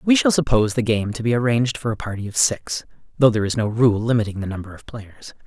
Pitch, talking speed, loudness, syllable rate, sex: 115 Hz, 250 wpm, -20 LUFS, 6.4 syllables/s, male